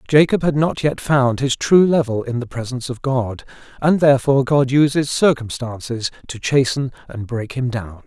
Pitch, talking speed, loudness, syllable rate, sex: 130 Hz, 180 wpm, -18 LUFS, 5.0 syllables/s, male